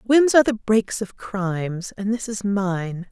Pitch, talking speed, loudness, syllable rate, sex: 205 Hz, 190 wpm, -22 LUFS, 4.3 syllables/s, female